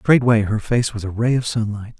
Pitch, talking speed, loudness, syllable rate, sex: 115 Hz, 240 wpm, -19 LUFS, 5.2 syllables/s, male